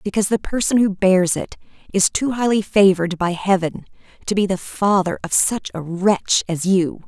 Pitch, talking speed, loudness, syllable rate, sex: 195 Hz, 185 wpm, -18 LUFS, 4.9 syllables/s, female